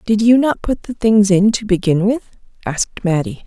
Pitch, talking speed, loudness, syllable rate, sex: 205 Hz, 210 wpm, -16 LUFS, 5.0 syllables/s, female